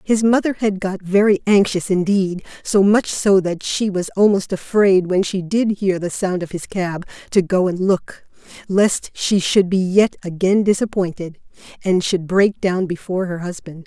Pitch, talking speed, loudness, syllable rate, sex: 190 Hz, 175 wpm, -18 LUFS, 4.5 syllables/s, female